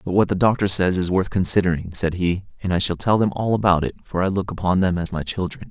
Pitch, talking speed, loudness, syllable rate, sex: 95 Hz, 275 wpm, -20 LUFS, 6.2 syllables/s, male